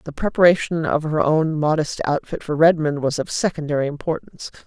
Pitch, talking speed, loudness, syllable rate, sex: 155 Hz, 165 wpm, -20 LUFS, 5.7 syllables/s, female